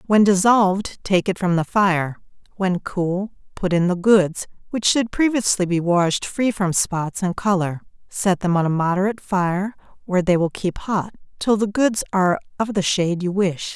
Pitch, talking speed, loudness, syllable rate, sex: 190 Hz, 190 wpm, -20 LUFS, 4.6 syllables/s, female